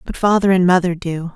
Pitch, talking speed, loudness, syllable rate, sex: 180 Hz, 220 wpm, -16 LUFS, 5.6 syllables/s, female